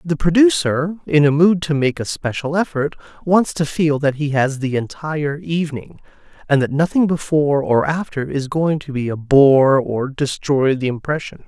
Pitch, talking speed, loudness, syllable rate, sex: 150 Hz, 185 wpm, -18 LUFS, 4.8 syllables/s, male